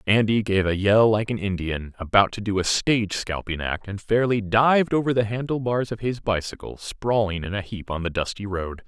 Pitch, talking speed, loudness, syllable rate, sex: 105 Hz, 210 wpm, -23 LUFS, 5.2 syllables/s, male